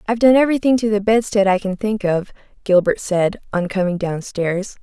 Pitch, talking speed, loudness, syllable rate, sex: 205 Hz, 185 wpm, -18 LUFS, 5.5 syllables/s, female